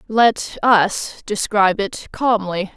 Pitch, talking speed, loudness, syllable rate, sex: 205 Hz, 110 wpm, -18 LUFS, 3.2 syllables/s, female